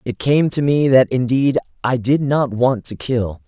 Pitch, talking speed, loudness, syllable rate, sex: 125 Hz, 205 wpm, -17 LUFS, 4.3 syllables/s, male